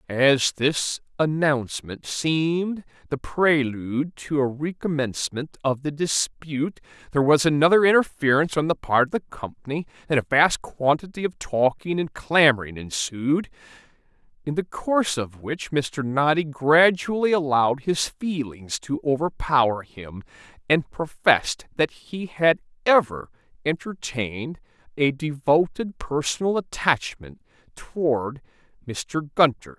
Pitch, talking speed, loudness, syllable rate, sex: 145 Hz, 120 wpm, -23 LUFS, 4.4 syllables/s, male